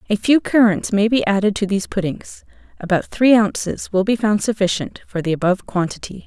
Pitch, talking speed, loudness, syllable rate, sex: 205 Hz, 190 wpm, -18 LUFS, 5.6 syllables/s, female